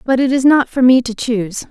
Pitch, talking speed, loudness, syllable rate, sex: 250 Hz, 280 wpm, -14 LUFS, 5.6 syllables/s, female